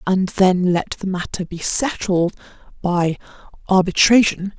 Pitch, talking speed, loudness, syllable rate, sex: 185 Hz, 120 wpm, -18 LUFS, 4.1 syllables/s, female